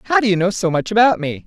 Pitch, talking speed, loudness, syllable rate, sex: 200 Hz, 330 wpm, -16 LUFS, 6.3 syllables/s, female